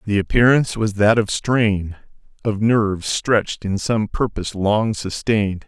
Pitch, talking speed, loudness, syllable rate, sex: 105 Hz, 150 wpm, -19 LUFS, 4.5 syllables/s, male